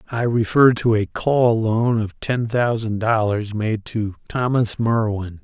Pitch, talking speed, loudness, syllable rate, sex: 110 Hz, 155 wpm, -20 LUFS, 3.7 syllables/s, male